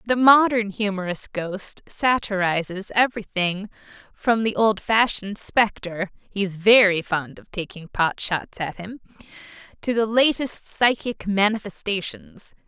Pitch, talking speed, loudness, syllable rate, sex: 205 Hz, 115 wpm, -22 LUFS, 3.4 syllables/s, female